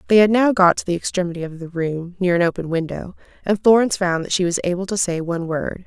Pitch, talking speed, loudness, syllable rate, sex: 180 Hz, 255 wpm, -19 LUFS, 6.4 syllables/s, female